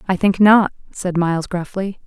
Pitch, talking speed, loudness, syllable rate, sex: 190 Hz, 175 wpm, -17 LUFS, 4.8 syllables/s, female